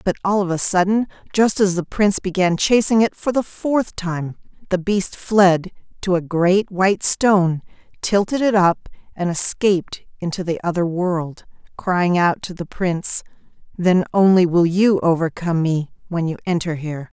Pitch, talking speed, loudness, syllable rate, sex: 185 Hz, 165 wpm, -19 LUFS, 4.7 syllables/s, female